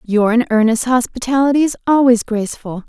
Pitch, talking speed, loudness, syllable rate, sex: 240 Hz, 145 wpm, -15 LUFS, 5.7 syllables/s, female